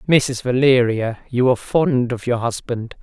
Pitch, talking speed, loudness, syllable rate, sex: 130 Hz, 160 wpm, -18 LUFS, 4.3 syllables/s, female